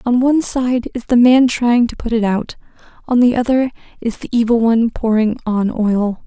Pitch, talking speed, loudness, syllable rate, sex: 235 Hz, 200 wpm, -15 LUFS, 5.0 syllables/s, female